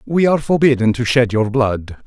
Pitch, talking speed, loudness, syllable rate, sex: 125 Hz, 205 wpm, -15 LUFS, 5.3 syllables/s, male